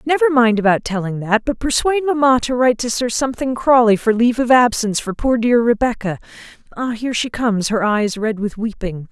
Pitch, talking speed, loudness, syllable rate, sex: 235 Hz, 195 wpm, -17 LUFS, 5.9 syllables/s, female